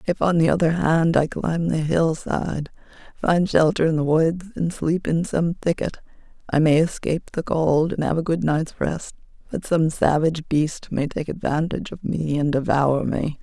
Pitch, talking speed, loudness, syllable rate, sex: 160 Hz, 190 wpm, -22 LUFS, 4.6 syllables/s, female